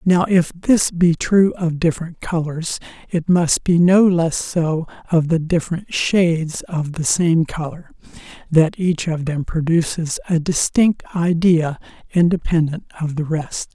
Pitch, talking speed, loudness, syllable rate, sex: 165 Hz, 150 wpm, -18 LUFS, 4.1 syllables/s, male